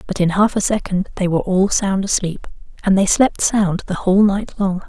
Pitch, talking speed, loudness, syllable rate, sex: 190 Hz, 220 wpm, -17 LUFS, 5.3 syllables/s, female